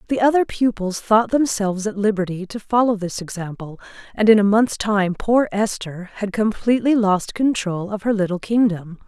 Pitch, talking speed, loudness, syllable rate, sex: 205 Hz, 170 wpm, -19 LUFS, 5.0 syllables/s, female